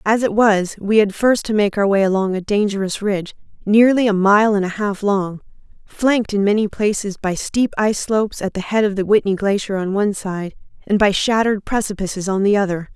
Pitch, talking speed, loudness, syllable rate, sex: 205 Hz, 215 wpm, -18 LUFS, 5.6 syllables/s, female